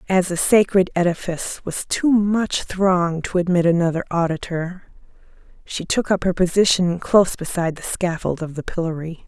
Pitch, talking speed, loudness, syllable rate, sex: 180 Hz, 155 wpm, -20 LUFS, 5.1 syllables/s, female